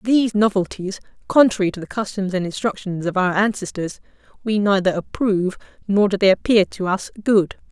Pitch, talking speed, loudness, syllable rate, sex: 200 Hz, 165 wpm, -20 LUFS, 5.5 syllables/s, female